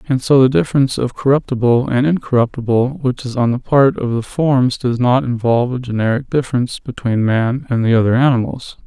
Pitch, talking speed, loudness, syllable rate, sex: 125 Hz, 190 wpm, -16 LUFS, 5.7 syllables/s, male